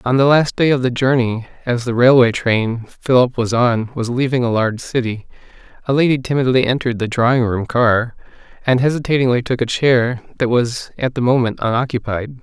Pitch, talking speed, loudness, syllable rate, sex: 125 Hz, 185 wpm, -16 LUFS, 5.4 syllables/s, male